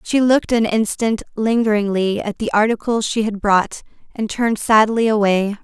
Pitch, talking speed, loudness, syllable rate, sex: 215 Hz, 160 wpm, -17 LUFS, 5.0 syllables/s, female